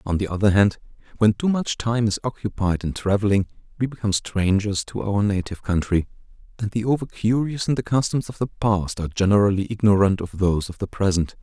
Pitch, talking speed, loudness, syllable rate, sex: 105 Hz, 195 wpm, -22 LUFS, 5.9 syllables/s, male